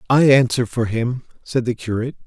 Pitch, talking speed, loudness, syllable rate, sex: 120 Hz, 185 wpm, -19 LUFS, 5.5 syllables/s, male